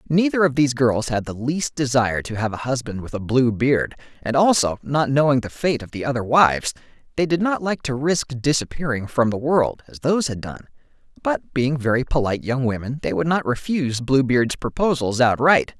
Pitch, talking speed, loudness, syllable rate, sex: 135 Hz, 200 wpm, -21 LUFS, 5.4 syllables/s, male